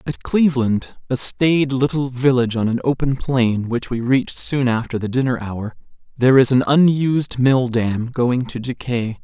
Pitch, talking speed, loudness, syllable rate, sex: 125 Hz, 175 wpm, -18 LUFS, 4.7 syllables/s, male